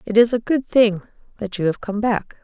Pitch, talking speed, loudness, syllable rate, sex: 215 Hz, 245 wpm, -19 LUFS, 5.3 syllables/s, female